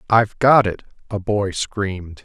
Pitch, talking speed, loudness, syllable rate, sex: 105 Hz, 160 wpm, -19 LUFS, 4.5 syllables/s, male